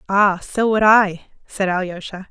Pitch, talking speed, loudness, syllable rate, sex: 195 Hz, 155 wpm, -17 LUFS, 4.5 syllables/s, female